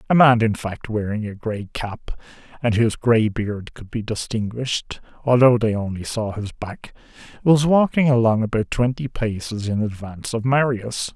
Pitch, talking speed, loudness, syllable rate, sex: 115 Hz, 165 wpm, -21 LUFS, 4.7 syllables/s, male